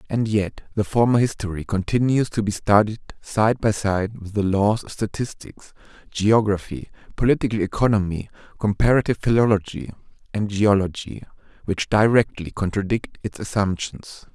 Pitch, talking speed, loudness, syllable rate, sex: 105 Hz, 120 wpm, -21 LUFS, 5.0 syllables/s, male